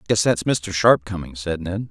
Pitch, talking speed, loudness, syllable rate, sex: 95 Hz, 220 wpm, -20 LUFS, 4.6 syllables/s, male